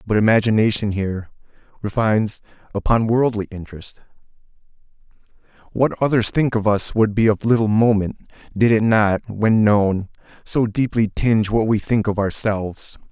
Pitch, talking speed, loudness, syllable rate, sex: 110 Hz, 135 wpm, -19 LUFS, 4.9 syllables/s, male